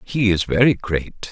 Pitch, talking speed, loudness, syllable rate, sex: 100 Hz, 185 wpm, -19 LUFS, 4.1 syllables/s, male